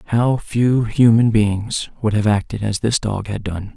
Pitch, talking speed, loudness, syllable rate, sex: 110 Hz, 190 wpm, -18 LUFS, 4.1 syllables/s, male